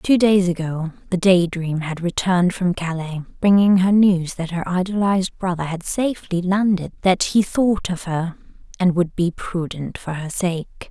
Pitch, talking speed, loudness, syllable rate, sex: 180 Hz, 175 wpm, -20 LUFS, 4.5 syllables/s, female